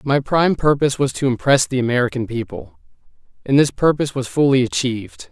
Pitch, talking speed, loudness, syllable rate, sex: 135 Hz, 170 wpm, -18 LUFS, 6.1 syllables/s, male